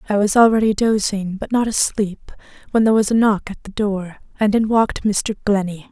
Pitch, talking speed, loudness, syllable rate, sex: 210 Hz, 205 wpm, -18 LUFS, 5.3 syllables/s, female